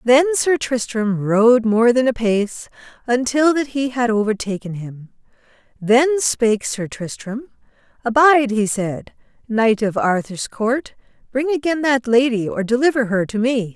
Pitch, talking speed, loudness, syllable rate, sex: 235 Hz, 150 wpm, -18 LUFS, 4.3 syllables/s, female